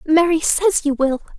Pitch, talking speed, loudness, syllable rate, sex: 315 Hz, 175 wpm, -17 LUFS, 4.5 syllables/s, female